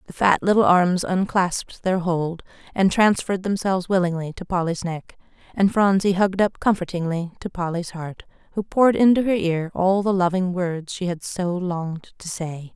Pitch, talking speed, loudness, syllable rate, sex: 180 Hz, 175 wpm, -21 LUFS, 5.0 syllables/s, female